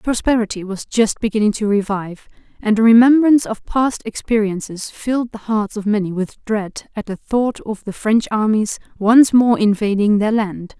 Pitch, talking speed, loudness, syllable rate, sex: 215 Hz, 170 wpm, -17 LUFS, 4.9 syllables/s, female